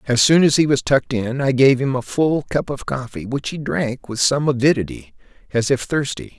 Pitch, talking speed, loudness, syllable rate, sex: 130 Hz, 225 wpm, -19 LUFS, 5.1 syllables/s, male